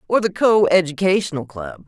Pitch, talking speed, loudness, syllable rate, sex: 175 Hz, 130 wpm, -18 LUFS, 5.3 syllables/s, female